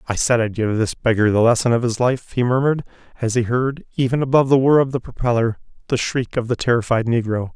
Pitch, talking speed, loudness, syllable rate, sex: 120 Hz, 230 wpm, -19 LUFS, 6.3 syllables/s, male